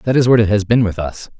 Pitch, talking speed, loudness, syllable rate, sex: 105 Hz, 345 wpm, -15 LUFS, 6.2 syllables/s, male